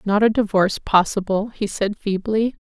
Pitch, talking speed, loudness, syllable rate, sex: 205 Hz, 180 wpm, -20 LUFS, 5.1 syllables/s, female